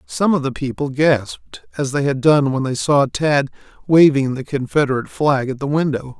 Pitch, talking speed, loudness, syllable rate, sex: 140 Hz, 195 wpm, -17 LUFS, 5.1 syllables/s, male